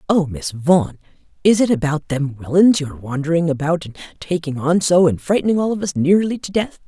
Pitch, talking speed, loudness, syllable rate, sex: 165 Hz, 210 wpm, -18 LUFS, 5.9 syllables/s, female